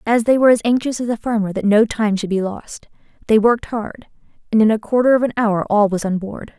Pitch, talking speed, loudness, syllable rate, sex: 220 Hz, 255 wpm, -17 LUFS, 5.9 syllables/s, female